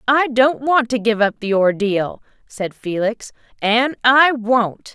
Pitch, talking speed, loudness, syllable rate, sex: 230 Hz, 160 wpm, -17 LUFS, 3.6 syllables/s, female